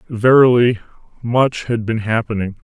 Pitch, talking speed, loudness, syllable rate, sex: 115 Hz, 110 wpm, -16 LUFS, 4.5 syllables/s, male